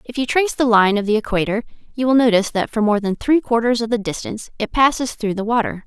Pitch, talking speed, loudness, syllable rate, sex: 225 Hz, 255 wpm, -18 LUFS, 6.5 syllables/s, female